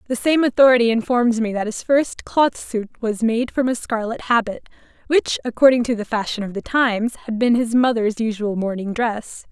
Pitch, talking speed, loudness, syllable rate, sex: 230 Hz, 195 wpm, -19 LUFS, 5.1 syllables/s, female